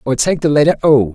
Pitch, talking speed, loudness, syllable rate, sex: 140 Hz, 265 wpm, -13 LUFS, 6.4 syllables/s, male